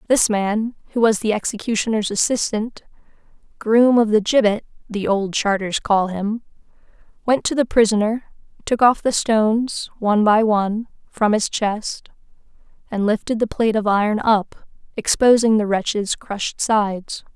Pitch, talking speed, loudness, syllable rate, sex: 215 Hz, 145 wpm, -19 LUFS, 4.6 syllables/s, female